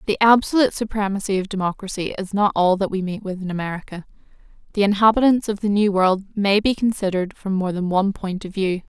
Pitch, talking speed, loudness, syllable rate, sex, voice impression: 200 Hz, 200 wpm, -20 LUFS, 6.3 syllables/s, female, feminine, slightly gender-neutral, slightly young, slightly adult-like, slightly thin, tensed, slightly powerful, slightly bright, hard, clear, fluent, slightly cool, very intellectual, very refreshing, sincere, calm, very friendly, reassuring, slightly unique, elegant, slightly wild, slightly lively, kind, slightly sharp, slightly modest